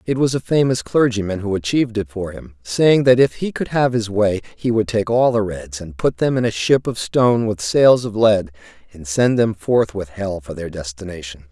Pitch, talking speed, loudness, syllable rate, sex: 105 Hz, 230 wpm, -18 LUFS, 5.0 syllables/s, male